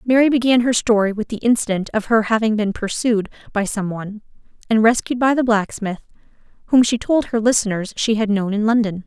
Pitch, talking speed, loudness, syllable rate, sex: 220 Hz, 200 wpm, -18 LUFS, 5.7 syllables/s, female